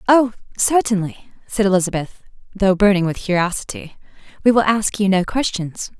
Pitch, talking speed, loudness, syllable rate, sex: 200 Hz, 140 wpm, -18 LUFS, 5.2 syllables/s, female